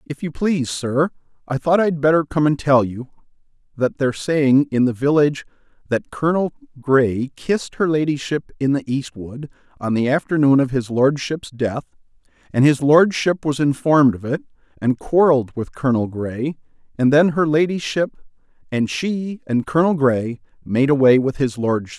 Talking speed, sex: 175 wpm, male